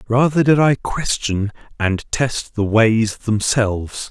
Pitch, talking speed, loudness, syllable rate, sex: 115 Hz, 130 wpm, -18 LUFS, 3.6 syllables/s, male